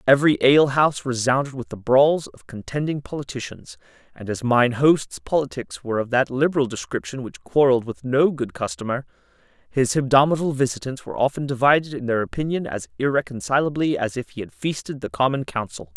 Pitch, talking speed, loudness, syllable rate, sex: 130 Hz, 165 wpm, -22 LUFS, 5.9 syllables/s, male